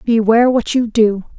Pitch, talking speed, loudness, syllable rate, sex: 225 Hz, 175 wpm, -14 LUFS, 4.9 syllables/s, female